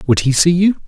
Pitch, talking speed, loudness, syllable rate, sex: 160 Hz, 275 wpm, -13 LUFS, 5.6 syllables/s, male